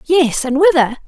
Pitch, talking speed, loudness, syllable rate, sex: 300 Hz, 170 wpm, -14 LUFS, 4.5 syllables/s, female